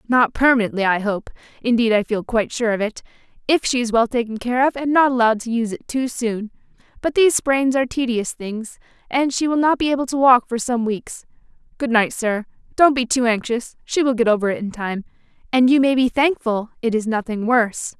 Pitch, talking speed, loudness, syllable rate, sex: 240 Hz, 220 wpm, -19 LUFS, 5.7 syllables/s, female